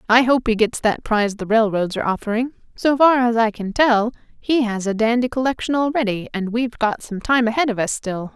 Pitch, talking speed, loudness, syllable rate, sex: 230 Hz, 225 wpm, -19 LUFS, 5.6 syllables/s, female